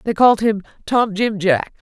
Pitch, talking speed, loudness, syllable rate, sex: 210 Hz, 190 wpm, -17 LUFS, 4.9 syllables/s, female